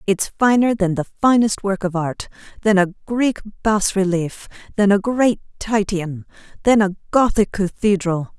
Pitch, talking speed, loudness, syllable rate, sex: 200 Hz, 145 wpm, -19 LUFS, 4.5 syllables/s, female